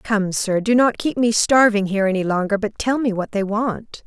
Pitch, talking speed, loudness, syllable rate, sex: 215 Hz, 235 wpm, -19 LUFS, 5.0 syllables/s, female